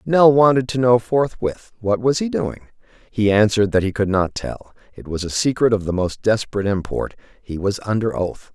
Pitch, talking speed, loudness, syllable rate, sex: 110 Hz, 205 wpm, -19 LUFS, 5.2 syllables/s, male